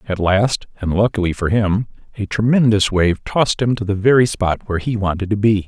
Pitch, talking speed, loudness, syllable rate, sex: 105 Hz, 210 wpm, -17 LUFS, 5.6 syllables/s, male